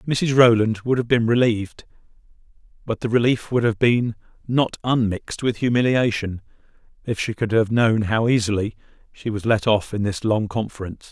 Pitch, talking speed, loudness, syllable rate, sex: 115 Hz, 165 wpm, -21 LUFS, 5.2 syllables/s, male